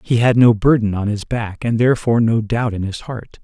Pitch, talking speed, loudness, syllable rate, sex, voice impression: 115 Hz, 245 wpm, -17 LUFS, 5.4 syllables/s, male, masculine, adult-like, slightly thick, cool, intellectual, slightly calm, slightly elegant